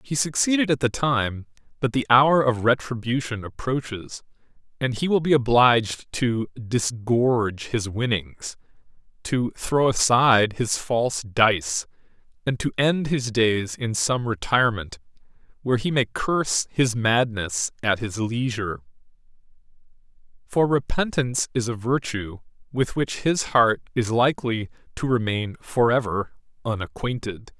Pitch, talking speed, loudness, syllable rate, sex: 120 Hz, 125 wpm, -23 LUFS, 4.3 syllables/s, male